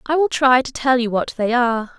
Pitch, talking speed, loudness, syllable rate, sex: 250 Hz, 270 wpm, -18 LUFS, 5.5 syllables/s, female